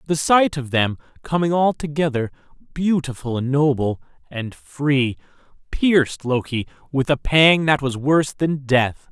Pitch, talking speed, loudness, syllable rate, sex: 140 Hz, 130 wpm, -20 LUFS, 4.3 syllables/s, male